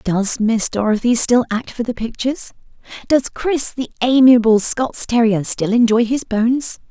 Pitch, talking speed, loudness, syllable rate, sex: 235 Hz, 155 wpm, -16 LUFS, 4.5 syllables/s, female